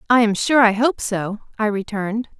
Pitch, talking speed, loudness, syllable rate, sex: 220 Hz, 200 wpm, -19 LUFS, 5.2 syllables/s, female